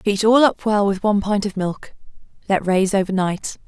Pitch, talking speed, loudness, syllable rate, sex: 200 Hz, 210 wpm, -19 LUFS, 5.3 syllables/s, female